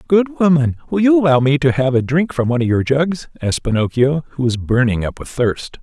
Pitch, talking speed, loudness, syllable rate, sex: 140 Hz, 235 wpm, -16 LUFS, 5.7 syllables/s, male